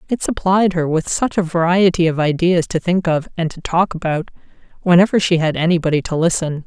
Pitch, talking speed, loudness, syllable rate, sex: 170 Hz, 200 wpm, -17 LUFS, 5.6 syllables/s, female